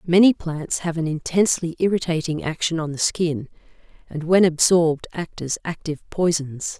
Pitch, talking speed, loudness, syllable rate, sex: 165 Hz, 150 wpm, -21 LUFS, 5.1 syllables/s, female